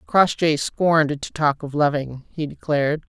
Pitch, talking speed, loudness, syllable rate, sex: 150 Hz, 155 wpm, -21 LUFS, 4.5 syllables/s, female